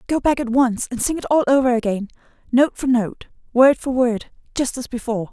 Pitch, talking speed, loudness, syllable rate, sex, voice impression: 250 Hz, 215 wpm, -19 LUFS, 5.5 syllables/s, female, very feminine, slightly young, slightly adult-like, very thin, slightly relaxed, slightly weak, slightly dark, slightly muffled, fluent, cute, intellectual, refreshing, very sincere, calm, friendly, reassuring, slightly unique, elegant, slightly wild, slightly sweet, slightly lively, kind, slightly modest